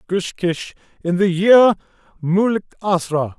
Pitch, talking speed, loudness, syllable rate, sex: 185 Hz, 90 wpm, -17 LUFS, 3.7 syllables/s, male